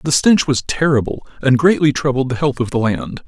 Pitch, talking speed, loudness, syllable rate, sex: 135 Hz, 220 wpm, -16 LUFS, 5.4 syllables/s, male